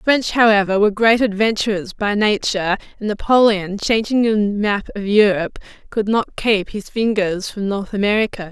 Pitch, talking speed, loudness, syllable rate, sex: 210 Hz, 160 wpm, -17 LUFS, 5.3 syllables/s, female